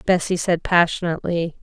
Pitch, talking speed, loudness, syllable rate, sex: 170 Hz, 110 wpm, -20 LUFS, 5.5 syllables/s, female